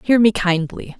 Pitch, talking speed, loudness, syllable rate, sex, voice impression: 195 Hz, 180 wpm, -17 LUFS, 4.6 syllables/s, female, feminine, adult-like, tensed, bright, soft, slightly nasal, intellectual, calm, friendly, reassuring, elegant, lively, slightly kind